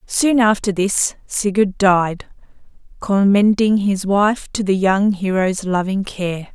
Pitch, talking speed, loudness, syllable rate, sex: 200 Hz, 130 wpm, -17 LUFS, 3.6 syllables/s, female